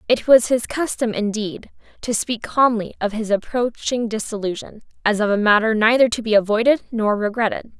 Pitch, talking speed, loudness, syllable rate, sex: 225 Hz, 170 wpm, -19 LUFS, 5.2 syllables/s, female